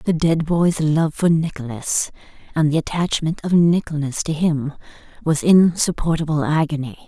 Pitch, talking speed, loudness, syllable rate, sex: 160 Hz, 135 wpm, -19 LUFS, 4.6 syllables/s, female